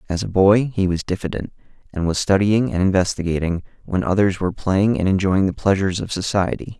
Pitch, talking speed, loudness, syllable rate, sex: 95 Hz, 185 wpm, -19 LUFS, 5.9 syllables/s, male